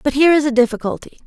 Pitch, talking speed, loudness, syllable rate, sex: 270 Hz, 235 wpm, -16 LUFS, 8.1 syllables/s, female